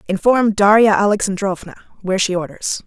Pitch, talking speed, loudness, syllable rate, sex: 200 Hz, 125 wpm, -16 LUFS, 5.8 syllables/s, female